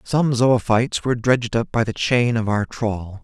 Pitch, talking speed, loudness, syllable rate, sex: 115 Hz, 205 wpm, -20 LUFS, 4.8 syllables/s, male